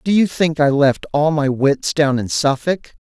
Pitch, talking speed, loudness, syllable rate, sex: 150 Hz, 215 wpm, -17 LUFS, 4.3 syllables/s, male